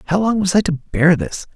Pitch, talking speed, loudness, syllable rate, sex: 175 Hz, 270 wpm, -17 LUFS, 5.5 syllables/s, male